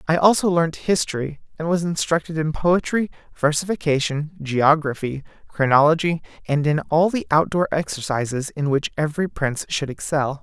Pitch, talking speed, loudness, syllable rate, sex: 155 Hz, 140 wpm, -21 LUFS, 5.1 syllables/s, male